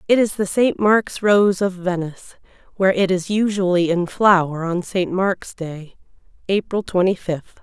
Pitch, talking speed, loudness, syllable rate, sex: 185 Hz, 165 wpm, -19 LUFS, 4.5 syllables/s, female